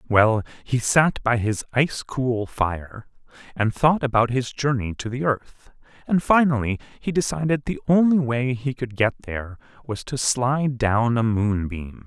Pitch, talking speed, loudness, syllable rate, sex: 125 Hz, 165 wpm, -22 LUFS, 4.4 syllables/s, male